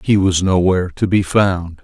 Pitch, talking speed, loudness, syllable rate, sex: 95 Hz, 195 wpm, -15 LUFS, 4.7 syllables/s, male